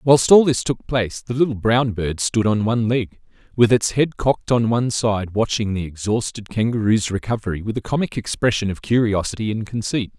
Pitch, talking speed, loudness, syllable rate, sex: 110 Hz, 195 wpm, -20 LUFS, 5.5 syllables/s, male